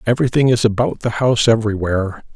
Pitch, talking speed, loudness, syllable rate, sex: 115 Hz, 155 wpm, -17 LUFS, 6.9 syllables/s, male